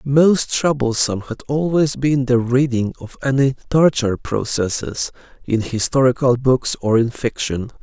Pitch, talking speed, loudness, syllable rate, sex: 125 Hz, 130 wpm, -18 LUFS, 4.5 syllables/s, male